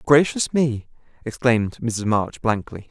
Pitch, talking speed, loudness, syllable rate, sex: 120 Hz, 125 wpm, -21 LUFS, 4.2 syllables/s, male